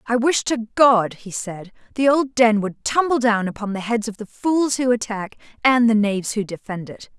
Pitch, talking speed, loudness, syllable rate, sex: 230 Hz, 215 wpm, -20 LUFS, 4.8 syllables/s, female